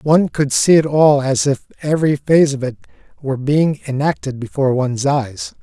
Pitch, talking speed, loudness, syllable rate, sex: 140 Hz, 180 wpm, -16 LUFS, 5.5 syllables/s, male